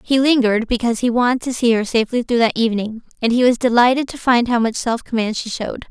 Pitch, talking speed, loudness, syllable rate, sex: 235 Hz, 245 wpm, -17 LUFS, 6.7 syllables/s, female